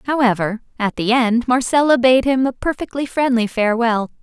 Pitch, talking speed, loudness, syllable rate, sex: 245 Hz, 155 wpm, -17 LUFS, 5.1 syllables/s, female